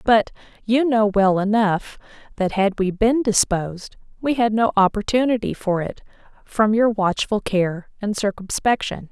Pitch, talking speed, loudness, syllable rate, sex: 210 Hz, 145 wpm, -20 LUFS, 4.4 syllables/s, female